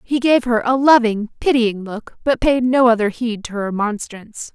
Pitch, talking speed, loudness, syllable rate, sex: 235 Hz, 200 wpm, -17 LUFS, 5.0 syllables/s, female